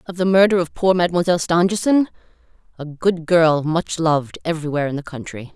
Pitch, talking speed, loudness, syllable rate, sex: 170 Hz, 160 wpm, -18 LUFS, 6.2 syllables/s, female